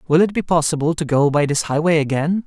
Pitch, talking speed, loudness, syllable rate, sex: 160 Hz, 245 wpm, -18 LUFS, 6.1 syllables/s, male